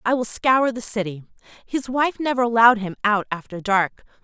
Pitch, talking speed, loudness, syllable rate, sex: 225 Hz, 185 wpm, -21 LUFS, 5.3 syllables/s, female